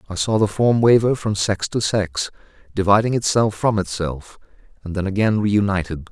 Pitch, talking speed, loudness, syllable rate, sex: 100 Hz, 165 wpm, -19 LUFS, 5.0 syllables/s, male